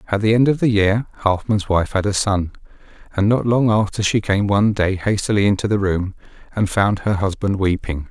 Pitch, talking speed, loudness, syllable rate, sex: 100 Hz, 205 wpm, -18 LUFS, 5.3 syllables/s, male